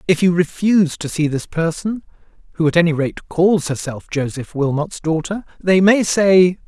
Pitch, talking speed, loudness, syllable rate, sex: 170 Hz, 170 wpm, -17 LUFS, 4.7 syllables/s, male